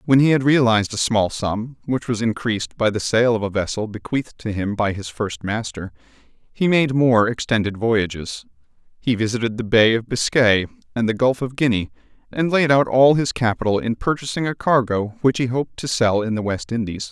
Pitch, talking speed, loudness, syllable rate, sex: 115 Hz, 205 wpm, -20 LUFS, 5.2 syllables/s, male